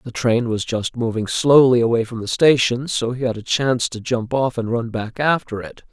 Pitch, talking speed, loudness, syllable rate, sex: 120 Hz, 235 wpm, -19 LUFS, 5.1 syllables/s, male